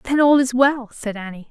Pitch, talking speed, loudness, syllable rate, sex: 245 Hz, 240 wpm, -18 LUFS, 5.2 syllables/s, female